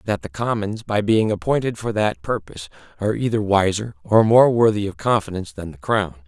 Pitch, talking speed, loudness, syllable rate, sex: 105 Hz, 190 wpm, -20 LUFS, 5.6 syllables/s, male